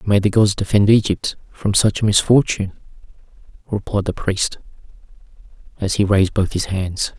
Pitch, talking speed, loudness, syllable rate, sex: 100 Hz, 150 wpm, -18 LUFS, 5.2 syllables/s, male